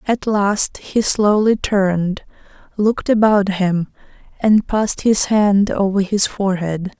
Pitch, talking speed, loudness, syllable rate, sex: 200 Hz, 130 wpm, -16 LUFS, 3.9 syllables/s, female